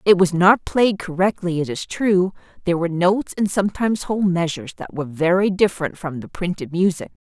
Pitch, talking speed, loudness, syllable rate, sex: 180 Hz, 190 wpm, -20 LUFS, 6.0 syllables/s, female